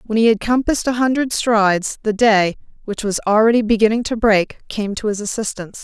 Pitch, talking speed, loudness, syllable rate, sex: 220 Hz, 195 wpm, -17 LUFS, 5.8 syllables/s, female